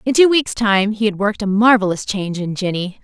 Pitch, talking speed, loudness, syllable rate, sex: 210 Hz, 235 wpm, -16 LUFS, 5.9 syllables/s, female